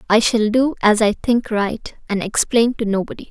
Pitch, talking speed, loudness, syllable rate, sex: 220 Hz, 200 wpm, -18 LUFS, 4.9 syllables/s, female